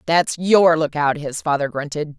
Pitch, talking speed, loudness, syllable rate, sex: 155 Hz, 165 wpm, -18 LUFS, 4.5 syllables/s, female